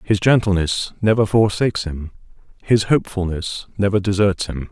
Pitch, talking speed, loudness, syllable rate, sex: 100 Hz, 125 wpm, -19 LUFS, 5.0 syllables/s, male